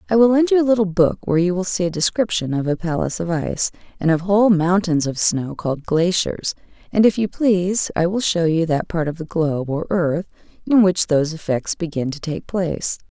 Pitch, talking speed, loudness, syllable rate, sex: 180 Hz, 225 wpm, -19 LUFS, 5.7 syllables/s, female